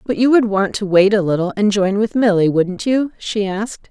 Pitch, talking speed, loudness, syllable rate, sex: 205 Hz, 245 wpm, -16 LUFS, 5.1 syllables/s, female